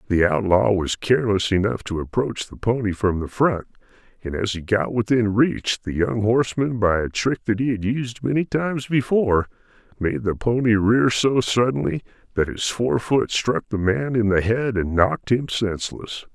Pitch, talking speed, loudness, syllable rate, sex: 110 Hz, 185 wpm, -21 LUFS, 4.8 syllables/s, male